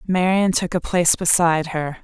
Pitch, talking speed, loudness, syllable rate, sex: 175 Hz, 175 wpm, -18 LUFS, 5.2 syllables/s, female